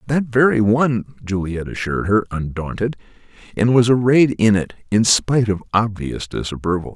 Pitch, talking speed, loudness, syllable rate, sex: 110 Hz, 145 wpm, -18 LUFS, 5.3 syllables/s, male